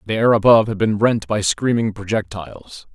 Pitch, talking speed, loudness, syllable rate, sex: 105 Hz, 185 wpm, -17 LUFS, 5.5 syllables/s, male